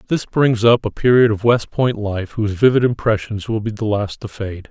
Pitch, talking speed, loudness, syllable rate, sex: 110 Hz, 230 wpm, -17 LUFS, 5.1 syllables/s, male